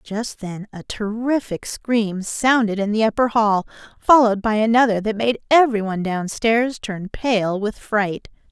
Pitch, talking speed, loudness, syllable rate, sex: 220 Hz, 160 wpm, -19 LUFS, 4.4 syllables/s, female